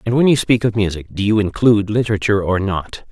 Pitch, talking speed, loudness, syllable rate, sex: 105 Hz, 230 wpm, -17 LUFS, 6.4 syllables/s, male